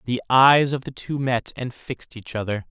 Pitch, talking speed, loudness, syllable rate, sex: 125 Hz, 220 wpm, -21 LUFS, 4.9 syllables/s, male